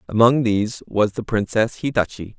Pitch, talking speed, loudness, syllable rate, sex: 110 Hz, 150 wpm, -20 LUFS, 5.0 syllables/s, male